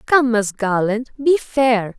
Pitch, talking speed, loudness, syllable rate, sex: 235 Hz, 150 wpm, -18 LUFS, 3.4 syllables/s, female